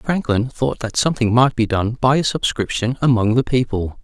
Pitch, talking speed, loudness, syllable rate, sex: 120 Hz, 180 wpm, -18 LUFS, 4.8 syllables/s, male